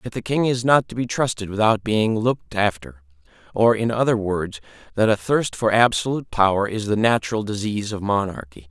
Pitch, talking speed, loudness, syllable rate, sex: 105 Hz, 195 wpm, -21 LUFS, 5.5 syllables/s, male